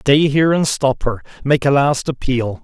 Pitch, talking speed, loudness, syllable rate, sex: 135 Hz, 180 wpm, -16 LUFS, 5.0 syllables/s, male